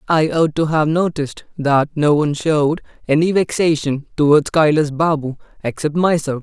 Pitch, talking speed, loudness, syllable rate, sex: 155 Hz, 150 wpm, -17 LUFS, 5.0 syllables/s, male